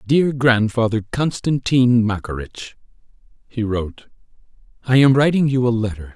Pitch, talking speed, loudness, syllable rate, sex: 120 Hz, 115 wpm, -18 LUFS, 4.7 syllables/s, male